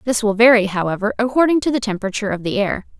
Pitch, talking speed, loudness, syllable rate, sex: 220 Hz, 220 wpm, -17 LUFS, 7.3 syllables/s, female